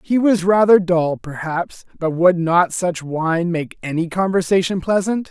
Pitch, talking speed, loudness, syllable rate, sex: 175 Hz, 160 wpm, -18 LUFS, 4.2 syllables/s, male